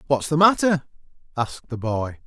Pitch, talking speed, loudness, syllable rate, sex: 140 Hz, 160 wpm, -22 LUFS, 5.6 syllables/s, male